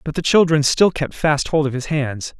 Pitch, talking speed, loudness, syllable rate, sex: 150 Hz, 250 wpm, -18 LUFS, 4.8 syllables/s, male